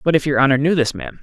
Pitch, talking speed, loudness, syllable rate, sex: 140 Hz, 345 wpm, -17 LUFS, 7.1 syllables/s, male